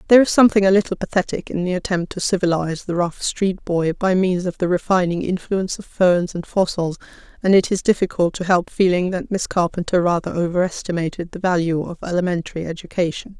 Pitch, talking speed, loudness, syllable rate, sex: 180 Hz, 190 wpm, -20 LUFS, 6.0 syllables/s, female